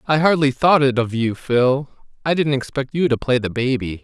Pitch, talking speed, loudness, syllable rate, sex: 135 Hz, 225 wpm, -19 LUFS, 5.1 syllables/s, male